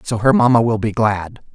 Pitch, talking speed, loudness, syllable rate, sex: 115 Hz, 230 wpm, -16 LUFS, 5.2 syllables/s, male